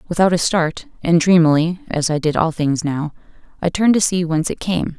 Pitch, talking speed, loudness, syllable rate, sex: 170 Hz, 215 wpm, -17 LUFS, 4.9 syllables/s, female